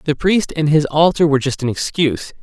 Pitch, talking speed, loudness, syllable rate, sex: 150 Hz, 225 wpm, -16 LUFS, 5.9 syllables/s, male